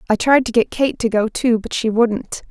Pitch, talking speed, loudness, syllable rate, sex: 230 Hz, 265 wpm, -17 LUFS, 4.9 syllables/s, female